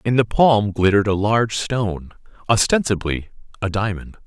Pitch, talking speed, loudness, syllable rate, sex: 105 Hz, 125 wpm, -19 LUFS, 5.2 syllables/s, male